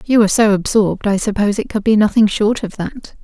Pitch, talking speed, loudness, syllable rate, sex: 210 Hz, 240 wpm, -15 LUFS, 6.2 syllables/s, female